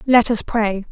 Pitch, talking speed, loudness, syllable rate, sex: 220 Hz, 195 wpm, -17 LUFS, 4.0 syllables/s, female